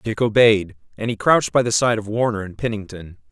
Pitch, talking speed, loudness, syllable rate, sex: 105 Hz, 215 wpm, -19 LUFS, 5.7 syllables/s, male